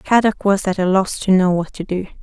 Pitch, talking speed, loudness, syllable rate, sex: 190 Hz, 270 wpm, -17 LUFS, 5.6 syllables/s, female